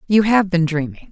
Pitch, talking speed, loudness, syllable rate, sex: 180 Hz, 215 wpm, -17 LUFS, 5.4 syllables/s, female